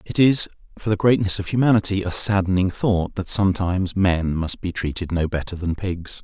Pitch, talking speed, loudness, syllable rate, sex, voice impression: 95 Hz, 190 wpm, -21 LUFS, 5.3 syllables/s, male, very masculine, very adult-like, thick, cool, sincere, calm, slightly wild